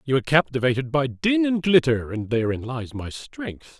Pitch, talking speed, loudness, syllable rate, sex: 135 Hz, 190 wpm, -22 LUFS, 4.9 syllables/s, male